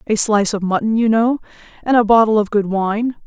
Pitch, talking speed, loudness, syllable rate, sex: 215 Hz, 220 wpm, -16 LUFS, 5.8 syllables/s, female